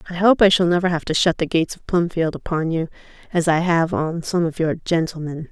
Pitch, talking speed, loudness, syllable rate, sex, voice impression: 170 Hz, 240 wpm, -20 LUFS, 5.9 syllables/s, female, feminine, adult-like, slightly fluent, slightly sincere, calm, slightly elegant